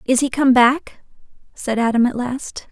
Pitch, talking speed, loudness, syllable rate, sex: 250 Hz, 175 wpm, -17 LUFS, 4.3 syllables/s, female